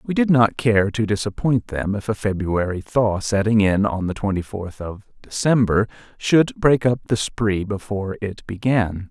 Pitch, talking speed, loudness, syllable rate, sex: 105 Hz, 180 wpm, -20 LUFS, 4.5 syllables/s, male